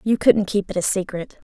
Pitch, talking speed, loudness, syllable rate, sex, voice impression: 200 Hz, 235 wpm, -20 LUFS, 5.3 syllables/s, female, very feminine, young, thin, slightly tensed, powerful, bright, slightly hard, clear, fluent, very cute, intellectual, refreshing, very sincere, calm, very friendly, reassuring, very unique, slightly elegant, wild, sweet, lively, kind, slightly intense, slightly sharp, light